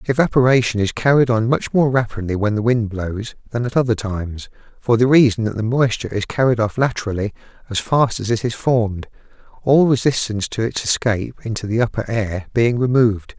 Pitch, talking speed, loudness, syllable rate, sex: 115 Hz, 190 wpm, -18 LUFS, 5.7 syllables/s, male